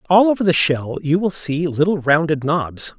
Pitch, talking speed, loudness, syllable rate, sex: 160 Hz, 200 wpm, -18 LUFS, 4.7 syllables/s, male